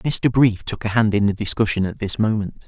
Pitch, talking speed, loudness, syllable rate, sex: 105 Hz, 245 wpm, -20 LUFS, 5.4 syllables/s, male